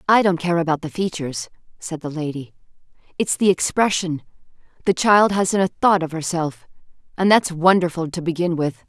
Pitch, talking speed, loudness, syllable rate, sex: 170 Hz, 170 wpm, -20 LUFS, 5.3 syllables/s, female